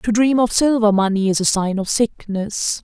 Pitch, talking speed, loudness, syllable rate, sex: 215 Hz, 210 wpm, -17 LUFS, 4.7 syllables/s, female